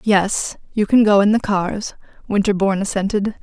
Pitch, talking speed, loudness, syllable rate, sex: 200 Hz, 160 wpm, -18 LUFS, 4.9 syllables/s, female